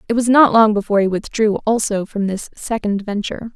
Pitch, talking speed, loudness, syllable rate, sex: 215 Hz, 205 wpm, -17 LUFS, 5.7 syllables/s, female